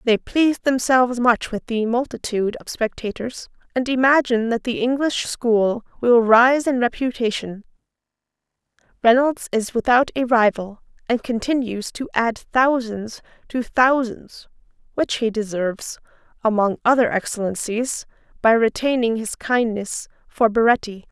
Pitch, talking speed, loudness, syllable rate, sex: 235 Hz, 120 wpm, -20 LUFS, 4.5 syllables/s, female